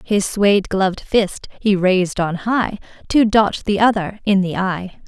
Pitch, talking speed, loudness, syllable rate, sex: 200 Hz, 175 wpm, -18 LUFS, 4.3 syllables/s, female